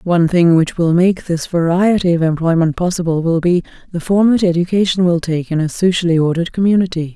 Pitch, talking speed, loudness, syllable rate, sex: 175 Hz, 195 wpm, -15 LUFS, 5.9 syllables/s, female